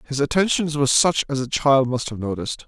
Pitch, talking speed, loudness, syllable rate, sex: 140 Hz, 225 wpm, -20 LUFS, 6.1 syllables/s, male